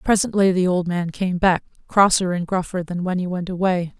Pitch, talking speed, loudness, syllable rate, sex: 180 Hz, 210 wpm, -20 LUFS, 5.2 syllables/s, female